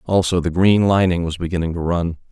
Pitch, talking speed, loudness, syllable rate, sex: 90 Hz, 205 wpm, -18 LUFS, 5.8 syllables/s, male